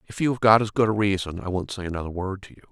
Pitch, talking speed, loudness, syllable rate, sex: 100 Hz, 330 wpm, -23 LUFS, 7.6 syllables/s, male